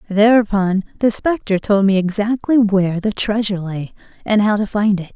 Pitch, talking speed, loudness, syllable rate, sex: 205 Hz, 175 wpm, -17 LUFS, 5.2 syllables/s, female